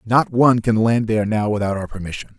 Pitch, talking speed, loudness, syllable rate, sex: 110 Hz, 225 wpm, -18 LUFS, 6.3 syllables/s, male